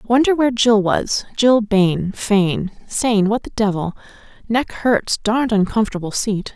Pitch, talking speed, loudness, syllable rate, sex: 215 Hz, 120 wpm, -18 LUFS, 4.8 syllables/s, female